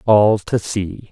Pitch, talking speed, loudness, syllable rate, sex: 100 Hz, 160 wpm, -17 LUFS, 3.1 syllables/s, male